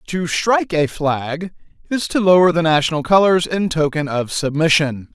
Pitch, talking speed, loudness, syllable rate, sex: 165 Hz, 165 wpm, -17 LUFS, 4.8 syllables/s, male